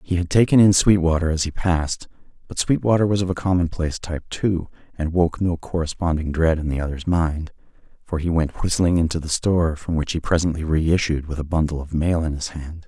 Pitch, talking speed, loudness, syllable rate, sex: 85 Hz, 210 wpm, -21 LUFS, 5.7 syllables/s, male